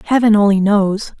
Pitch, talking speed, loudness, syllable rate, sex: 205 Hz, 150 wpm, -13 LUFS, 4.8 syllables/s, female